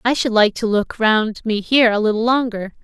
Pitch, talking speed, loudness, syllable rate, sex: 225 Hz, 235 wpm, -17 LUFS, 5.3 syllables/s, female